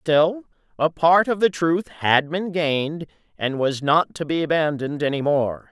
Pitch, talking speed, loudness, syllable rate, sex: 160 Hz, 180 wpm, -21 LUFS, 4.4 syllables/s, male